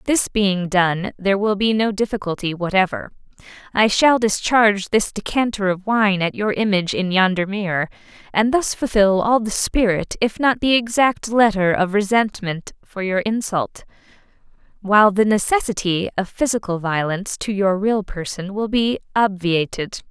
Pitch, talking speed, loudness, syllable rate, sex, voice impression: 205 Hz, 150 wpm, -19 LUFS, 4.8 syllables/s, female, feminine, adult-like, slightly intellectual, sincere, slightly friendly